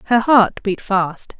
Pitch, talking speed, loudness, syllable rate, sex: 215 Hz, 170 wpm, -16 LUFS, 3.4 syllables/s, female